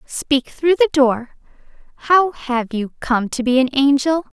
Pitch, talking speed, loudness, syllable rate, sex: 275 Hz, 165 wpm, -17 LUFS, 3.9 syllables/s, female